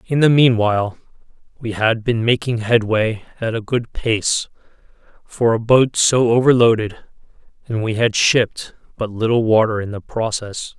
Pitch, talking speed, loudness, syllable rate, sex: 115 Hz, 150 wpm, -17 LUFS, 4.6 syllables/s, male